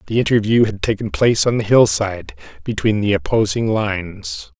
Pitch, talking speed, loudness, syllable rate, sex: 110 Hz, 155 wpm, -17 LUFS, 5.4 syllables/s, male